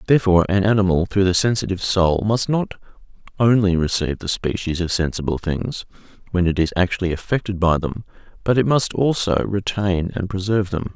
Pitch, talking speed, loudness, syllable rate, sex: 95 Hz, 170 wpm, -20 LUFS, 5.8 syllables/s, male